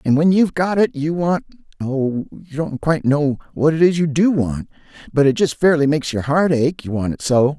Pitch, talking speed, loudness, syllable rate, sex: 150 Hz, 230 wpm, -18 LUFS, 5.4 syllables/s, male